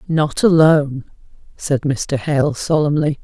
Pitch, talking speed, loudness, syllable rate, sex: 145 Hz, 110 wpm, -16 LUFS, 3.8 syllables/s, female